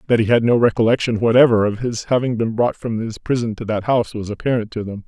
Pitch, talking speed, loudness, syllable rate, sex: 115 Hz, 250 wpm, -18 LUFS, 6.3 syllables/s, male